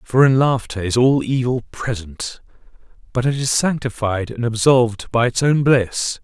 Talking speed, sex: 165 wpm, male